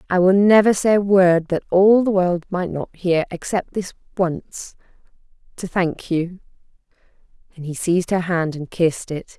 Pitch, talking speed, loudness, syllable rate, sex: 180 Hz, 160 wpm, -19 LUFS, 4.7 syllables/s, female